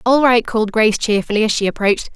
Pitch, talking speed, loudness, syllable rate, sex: 220 Hz, 225 wpm, -16 LUFS, 7.0 syllables/s, female